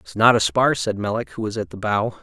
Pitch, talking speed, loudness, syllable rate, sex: 110 Hz, 295 wpm, -20 LUFS, 5.6 syllables/s, male